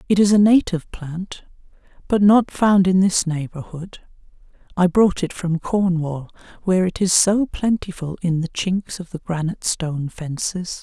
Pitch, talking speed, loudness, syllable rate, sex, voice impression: 180 Hz, 160 wpm, -19 LUFS, 4.6 syllables/s, female, feminine, adult-like, calm, slightly sweet